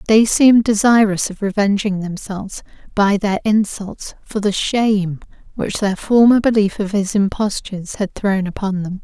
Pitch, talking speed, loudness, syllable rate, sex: 205 Hz, 155 wpm, -17 LUFS, 4.7 syllables/s, female